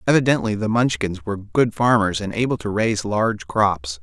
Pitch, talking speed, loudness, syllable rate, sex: 105 Hz, 180 wpm, -20 LUFS, 5.4 syllables/s, male